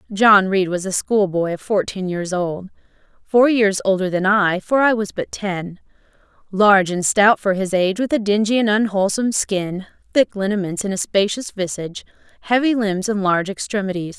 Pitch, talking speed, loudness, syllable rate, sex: 200 Hz, 180 wpm, -18 LUFS, 5.2 syllables/s, female